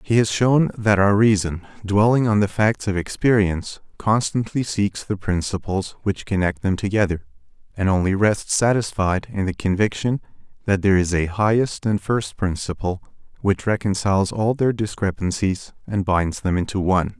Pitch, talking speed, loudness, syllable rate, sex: 100 Hz, 155 wpm, -21 LUFS, 4.9 syllables/s, male